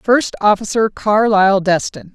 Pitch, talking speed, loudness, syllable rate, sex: 205 Hz, 110 wpm, -14 LUFS, 4.5 syllables/s, female